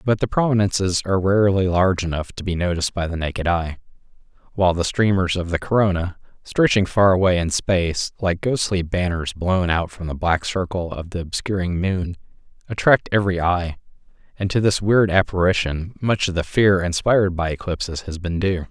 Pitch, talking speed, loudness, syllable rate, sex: 90 Hz, 180 wpm, -20 LUFS, 5.5 syllables/s, male